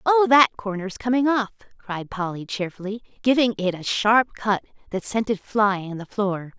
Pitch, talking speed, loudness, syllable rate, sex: 210 Hz, 180 wpm, -22 LUFS, 4.6 syllables/s, female